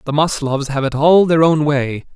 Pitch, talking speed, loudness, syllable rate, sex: 145 Hz, 225 wpm, -15 LUFS, 4.6 syllables/s, male